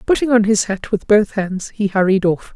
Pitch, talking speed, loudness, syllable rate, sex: 205 Hz, 235 wpm, -17 LUFS, 5.0 syllables/s, female